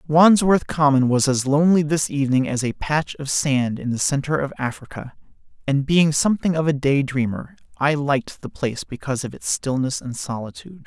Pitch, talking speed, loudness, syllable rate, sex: 140 Hz, 190 wpm, -20 LUFS, 5.4 syllables/s, male